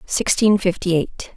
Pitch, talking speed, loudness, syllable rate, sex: 185 Hz, 130 wpm, -18 LUFS, 2.3 syllables/s, female